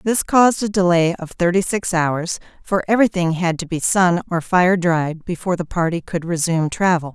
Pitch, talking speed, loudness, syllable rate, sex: 175 Hz, 195 wpm, -18 LUFS, 5.2 syllables/s, female